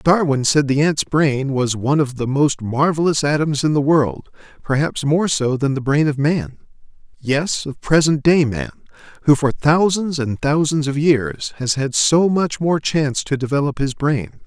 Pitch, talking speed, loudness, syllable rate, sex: 145 Hz, 185 wpm, -18 LUFS, 4.5 syllables/s, male